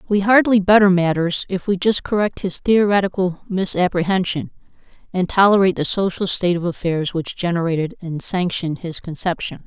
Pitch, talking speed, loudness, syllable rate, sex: 185 Hz, 150 wpm, -18 LUFS, 5.5 syllables/s, female